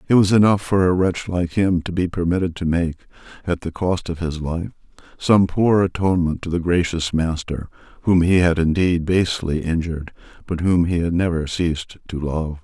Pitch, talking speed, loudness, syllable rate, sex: 85 Hz, 190 wpm, -20 LUFS, 5.1 syllables/s, male